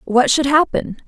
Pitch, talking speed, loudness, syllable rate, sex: 270 Hz, 170 wpm, -16 LUFS, 4.4 syllables/s, female